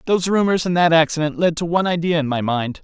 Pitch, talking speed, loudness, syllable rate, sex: 165 Hz, 255 wpm, -18 LUFS, 6.7 syllables/s, male